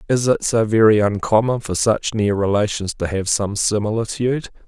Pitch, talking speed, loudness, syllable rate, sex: 110 Hz, 165 wpm, -18 LUFS, 5.1 syllables/s, male